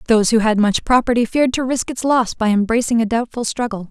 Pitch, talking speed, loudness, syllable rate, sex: 235 Hz, 230 wpm, -17 LUFS, 6.2 syllables/s, female